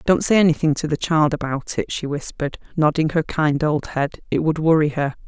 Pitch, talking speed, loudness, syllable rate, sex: 150 Hz, 215 wpm, -20 LUFS, 5.4 syllables/s, female